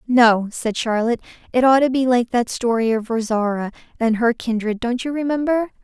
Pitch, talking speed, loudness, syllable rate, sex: 240 Hz, 185 wpm, -19 LUFS, 5.2 syllables/s, female